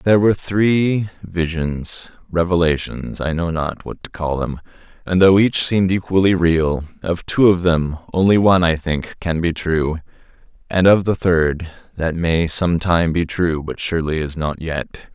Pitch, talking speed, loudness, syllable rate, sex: 85 Hz, 160 wpm, -18 LUFS, 4.3 syllables/s, male